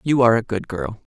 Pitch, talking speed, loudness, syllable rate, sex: 130 Hz, 270 wpm, -20 LUFS, 6.4 syllables/s, female